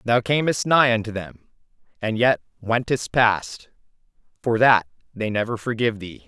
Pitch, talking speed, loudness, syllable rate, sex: 115 Hz, 145 wpm, -21 LUFS, 4.7 syllables/s, male